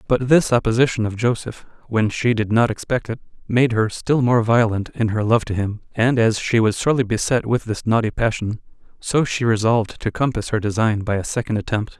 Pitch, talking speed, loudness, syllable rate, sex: 115 Hz, 210 wpm, -19 LUFS, 5.4 syllables/s, male